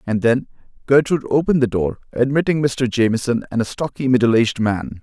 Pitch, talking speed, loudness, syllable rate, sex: 125 Hz, 180 wpm, -18 LUFS, 6.0 syllables/s, male